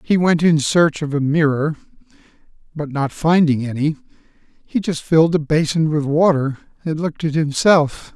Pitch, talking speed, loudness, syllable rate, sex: 155 Hz, 160 wpm, -17 LUFS, 4.7 syllables/s, male